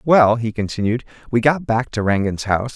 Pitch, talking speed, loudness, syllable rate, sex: 115 Hz, 195 wpm, -19 LUFS, 5.4 syllables/s, male